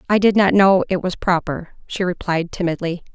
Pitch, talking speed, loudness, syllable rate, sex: 180 Hz, 190 wpm, -18 LUFS, 5.2 syllables/s, female